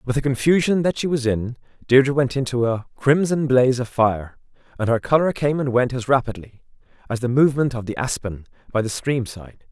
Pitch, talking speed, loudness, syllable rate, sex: 125 Hz, 205 wpm, -20 LUFS, 5.5 syllables/s, male